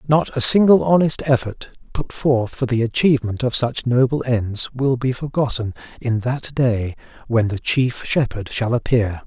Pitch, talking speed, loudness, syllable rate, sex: 125 Hz, 170 wpm, -19 LUFS, 4.4 syllables/s, male